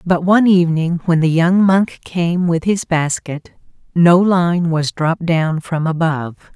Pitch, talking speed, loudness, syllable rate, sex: 170 Hz, 165 wpm, -15 LUFS, 4.2 syllables/s, female